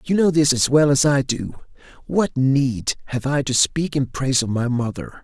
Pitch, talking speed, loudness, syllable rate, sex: 135 Hz, 220 wpm, -19 LUFS, 4.6 syllables/s, male